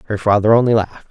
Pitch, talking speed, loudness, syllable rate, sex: 105 Hz, 220 wpm, -14 LUFS, 7.9 syllables/s, male